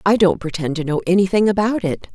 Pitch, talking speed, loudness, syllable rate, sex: 185 Hz, 225 wpm, -18 LUFS, 6.1 syllables/s, female